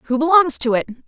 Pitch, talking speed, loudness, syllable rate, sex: 285 Hz, 225 wpm, -16 LUFS, 5.7 syllables/s, female